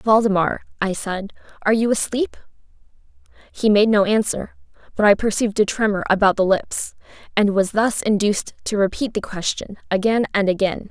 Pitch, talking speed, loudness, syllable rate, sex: 205 Hz, 160 wpm, -20 LUFS, 5.4 syllables/s, female